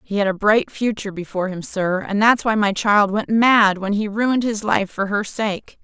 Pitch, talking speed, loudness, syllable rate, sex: 205 Hz, 235 wpm, -19 LUFS, 4.9 syllables/s, female